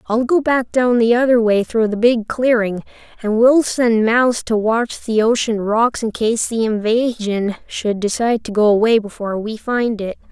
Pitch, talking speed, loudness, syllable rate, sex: 225 Hz, 190 wpm, -17 LUFS, 4.6 syllables/s, female